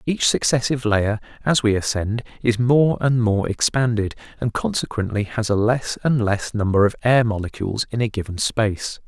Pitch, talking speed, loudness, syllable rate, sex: 115 Hz, 170 wpm, -20 LUFS, 5.1 syllables/s, male